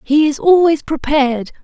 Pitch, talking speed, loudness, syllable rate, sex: 295 Hz, 145 wpm, -14 LUFS, 4.9 syllables/s, female